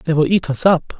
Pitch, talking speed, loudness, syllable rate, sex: 165 Hz, 300 wpm, -16 LUFS, 5.3 syllables/s, male